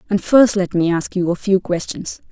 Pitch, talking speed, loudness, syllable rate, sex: 185 Hz, 235 wpm, -17 LUFS, 4.9 syllables/s, female